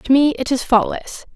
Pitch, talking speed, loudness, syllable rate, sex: 260 Hz, 220 wpm, -17 LUFS, 4.9 syllables/s, female